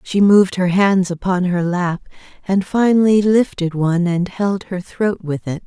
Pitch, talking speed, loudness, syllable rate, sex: 185 Hz, 180 wpm, -17 LUFS, 4.5 syllables/s, female